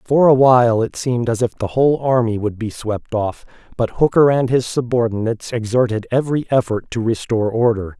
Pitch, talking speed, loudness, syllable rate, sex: 120 Hz, 190 wpm, -17 LUFS, 5.6 syllables/s, male